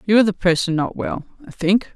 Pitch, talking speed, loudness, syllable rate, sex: 195 Hz, 245 wpm, -19 LUFS, 6.2 syllables/s, female